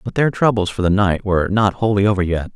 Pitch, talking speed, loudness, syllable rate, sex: 100 Hz, 260 wpm, -17 LUFS, 6.2 syllables/s, male